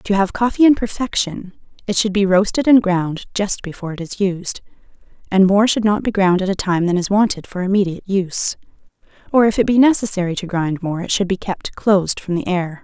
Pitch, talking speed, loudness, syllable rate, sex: 195 Hz, 220 wpm, -17 LUFS, 5.6 syllables/s, female